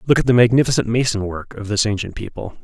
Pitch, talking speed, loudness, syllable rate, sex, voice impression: 115 Hz, 230 wpm, -18 LUFS, 6.5 syllables/s, male, very masculine, very adult-like, old, very thick, slightly tensed, powerful, slightly bright, slightly hard, muffled, very fluent, very cool, very intellectual, sincere, very calm, very mature, friendly, very reassuring, unique, elegant, wild, slightly sweet, slightly lively, very kind, modest